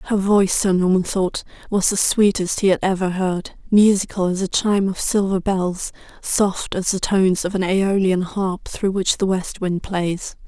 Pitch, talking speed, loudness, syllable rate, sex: 190 Hz, 190 wpm, -19 LUFS, 4.6 syllables/s, female